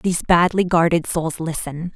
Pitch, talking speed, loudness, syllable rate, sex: 170 Hz, 155 wpm, -19 LUFS, 4.7 syllables/s, female